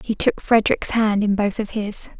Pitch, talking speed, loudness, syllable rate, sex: 210 Hz, 220 wpm, -20 LUFS, 4.9 syllables/s, female